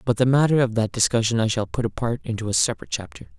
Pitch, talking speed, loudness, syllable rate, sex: 115 Hz, 250 wpm, -22 LUFS, 7.1 syllables/s, male